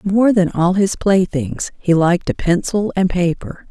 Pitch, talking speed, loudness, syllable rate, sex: 190 Hz, 180 wpm, -16 LUFS, 4.2 syllables/s, female